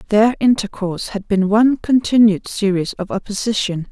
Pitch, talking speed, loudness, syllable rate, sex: 210 Hz, 140 wpm, -17 LUFS, 5.2 syllables/s, female